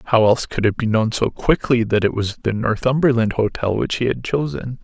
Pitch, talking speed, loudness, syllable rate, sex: 115 Hz, 225 wpm, -19 LUFS, 5.2 syllables/s, male